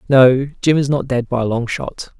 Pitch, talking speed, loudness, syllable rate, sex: 130 Hz, 245 wpm, -16 LUFS, 5.0 syllables/s, male